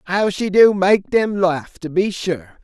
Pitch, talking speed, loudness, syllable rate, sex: 185 Hz, 205 wpm, -17 LUFS, 3.7 syllables/s, male